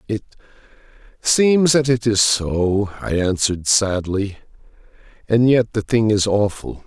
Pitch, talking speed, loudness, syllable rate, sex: 110 Hz, 130 wpm, -18 LUFS, 4.1 syllables/s, male